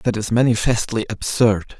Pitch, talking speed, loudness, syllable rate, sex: 110 Hz, 135 wpm, -19 LUFS, 4.7 syllables/s, male